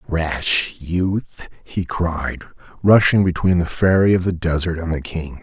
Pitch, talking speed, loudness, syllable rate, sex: 85 Hz, 155 wpm, -19 LUFS, 3.8 syllables/s, male